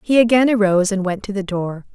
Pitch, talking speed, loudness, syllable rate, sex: 205 Hz, 245 wpm, -17 LUFS, 6.2 syllables/s, female